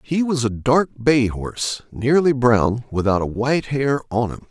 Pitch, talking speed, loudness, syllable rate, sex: 125 Hz, 185 wpm, -19 LUFS, 4.4 syllables/s, male